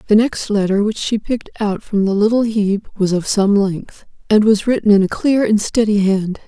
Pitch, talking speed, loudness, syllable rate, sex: 210 Hz, 220 wpm, -16 LUFS, 5.0 syllables/s, female